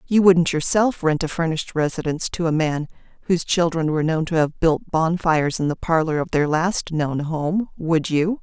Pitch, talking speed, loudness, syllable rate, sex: 165 Hz, 200 wpm, -21 LUFS, 5.1 syllables/s, female